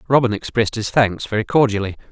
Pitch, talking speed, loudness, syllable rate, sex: 110 Hz, 170 wpm, -18 LUFS, 6.6 syllables/s, male